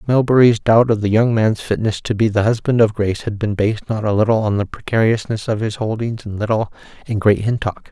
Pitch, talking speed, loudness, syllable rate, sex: 110 Hz, 230 wpm, -17 LUFS, 5.8 syllables/s, male